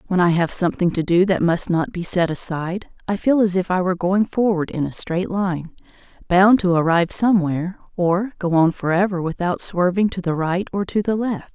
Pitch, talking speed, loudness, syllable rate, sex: 180 Hz, 215 wpm, -20 LUFS, 5.4 syllables/s, female